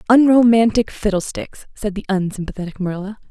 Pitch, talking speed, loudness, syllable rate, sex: 205 Hz, 110 wpm, -18 LUFS, 5.8 syllables/s, female